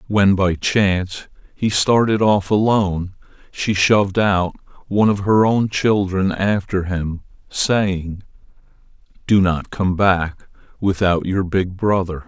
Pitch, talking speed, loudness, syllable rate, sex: 95 Hz, 125 wpm, -18 LUFS, 3.8 syllables/s, male